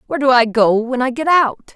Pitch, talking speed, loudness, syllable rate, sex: 255 Hz, 275 wpm, -15 LUFS, 6.0 syllables/s, female